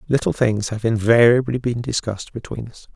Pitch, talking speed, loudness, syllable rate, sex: 115 Hz, 165 wpm, -19 LUFS, 5.5 syllables/s, male